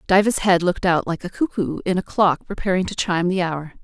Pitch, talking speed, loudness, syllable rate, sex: 185 Hz, 235 wpm, -20 LUFS, 5.8 syllables/s, female